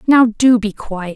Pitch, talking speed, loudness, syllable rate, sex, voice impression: 235 Hz, 210 wpm, -14 LUFS, 3.8 syllables/s, female, slightly feminine, slightly adult-like, powerful, slightly clear, slightly unique, intense